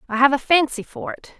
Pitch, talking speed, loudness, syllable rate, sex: 275 Hz, 260 wpm, -18 LUFS, 5.8 syllables/s, female